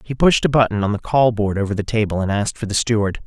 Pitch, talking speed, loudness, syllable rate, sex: 110 Hz, 295 wpm, -18 LUFS, 6.7 syllables/s, male